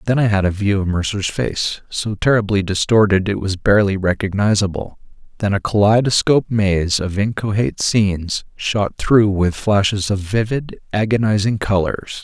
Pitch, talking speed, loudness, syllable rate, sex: 100 Hz, 145 wpm, -17 LUFS, 4.8 syllables/s, male